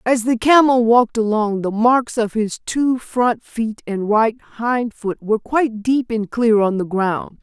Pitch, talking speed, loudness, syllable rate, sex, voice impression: 225 Hz, 195 wpm, -18 LUFS, 4.0 syllables/s, female, feminine, adult-like, slightly relaxed, slightly soft, slightly raspy, intellectual, calm, friendly, reassuring, lively, slightly kind, slightly modest